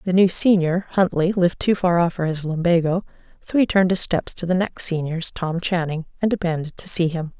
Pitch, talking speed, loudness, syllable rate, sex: 175 Hz, 220 wpm, -20 LUFS, 5.6 syllables/s, female